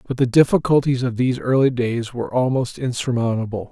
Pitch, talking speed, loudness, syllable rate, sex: 125 Hz, 160 wpm, -19 LUFS, 5.9 syllables/s, male